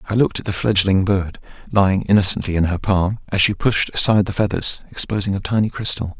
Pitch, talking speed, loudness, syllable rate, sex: 100 Hz, 205 wpm, -18 LUFS, 6.1 syllables/s, male